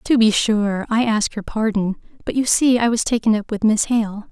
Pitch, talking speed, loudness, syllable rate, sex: 220 Hz, 235 wpm, -18 LUFS, 4.9 syllables/s, female